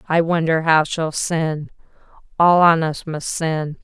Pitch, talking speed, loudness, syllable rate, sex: 160 Hz, 155 wpm, -18 LUFS, 3.8 syllables/s, female